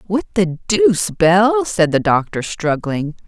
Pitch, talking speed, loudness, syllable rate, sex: 160 Hz, 145 wpm, -16 LUFS, 3.9 syllables/s, female